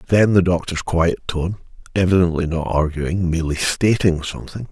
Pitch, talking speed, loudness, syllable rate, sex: 85 Hz, 140 wpm, -19 LUFS, 5.3 syllables/s, male